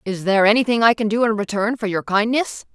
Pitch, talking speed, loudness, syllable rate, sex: 215 Hz, 240 wpm, -18 LUFS, 6.2 syllables/s, female